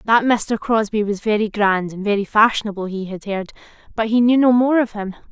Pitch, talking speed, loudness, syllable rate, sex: 215 Hz, 215 wpm, -18 LUFS, 5.5 syllables/s, female